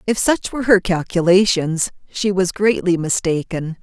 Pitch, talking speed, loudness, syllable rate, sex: 185 Hz, 140 wpm, -18 LUFS, 4.6 syllables/s, female